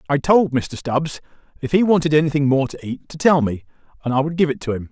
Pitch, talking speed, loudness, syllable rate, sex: 150 Hz, 255 wpm, -19 LUFS, 6.1 syllables/s, male